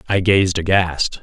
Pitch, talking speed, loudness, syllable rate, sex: 90 Hz, 145 wpm, -17 LUFS, 3.8 syllables/s, male